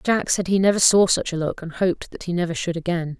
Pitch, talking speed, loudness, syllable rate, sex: 175 Hz, 280 wpm, -21 LUFS, 6.4 syllables/s, female